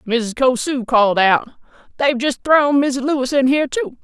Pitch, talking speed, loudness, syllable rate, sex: 265 Hz, 195 wpm, -16 LUFS, 5.0 syllables/s, female